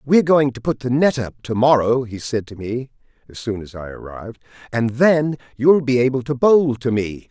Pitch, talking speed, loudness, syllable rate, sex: 125 Hz, 220 wpm, -18 LUFS, 5.1 syllables/s, male